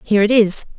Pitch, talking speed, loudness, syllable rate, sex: 210 Hz, 230 wpm, -15 LUFS, 6.7 syllables/s, female